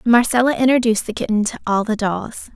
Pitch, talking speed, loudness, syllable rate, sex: 225 Hz, 190 wpm, -18 LUFS, 5.9 syllables/s, female